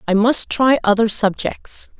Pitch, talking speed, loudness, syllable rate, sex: 225 Hz, 150 wpm, -16 LUFS, 4.1 syllables/s, female